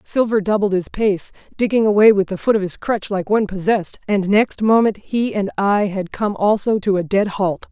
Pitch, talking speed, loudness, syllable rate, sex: 200 Hz, 220 wpm, -18 LUFS, 5.2 syllables/s, female